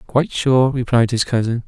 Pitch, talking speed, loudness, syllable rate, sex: 120 Hz, 180 wpm, -17 LUFS, 5.2 syllables/s, male